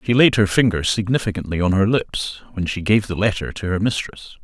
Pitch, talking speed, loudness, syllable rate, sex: 100 Hz, 215 wpm, -19 LUFS, 5.7 syllables/s, male